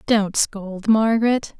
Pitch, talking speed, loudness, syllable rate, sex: 215 Hz, 115 wpm, -19 LUFS, 3.5 syllables/s, female